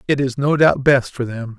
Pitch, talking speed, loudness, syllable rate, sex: 130 Hz, 265 wpm, -17 LUFS, 4.9 syllables/s, male